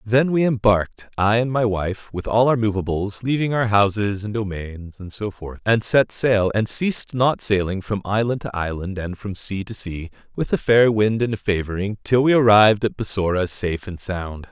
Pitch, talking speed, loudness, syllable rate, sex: 105 Hz, 205 wpm, -20 LUFS, 4.9 syllables/s, male